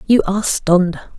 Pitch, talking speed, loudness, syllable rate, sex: 195 Hz, 150 wpm, -16 LUFS, 5.6 syllables/s, female